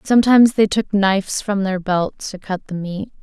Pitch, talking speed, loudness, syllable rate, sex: 200 Hz, 205 wpm, -18 LUFS, 4.9 syllables/s, female